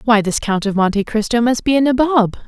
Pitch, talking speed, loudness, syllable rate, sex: 230 Hz, 240 wpm, -16 LUFS, 5.7 syllables/s, female